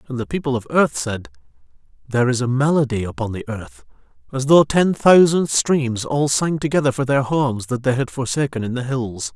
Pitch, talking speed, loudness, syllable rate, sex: 130 Hz, 200 wpm, -19 LUFS, 5.3 syllables/s, male